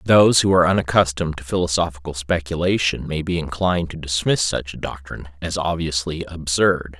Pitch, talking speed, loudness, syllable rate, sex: 80 Hz, 155 wpm, -20 LUFS, 5.7 syllables/s, male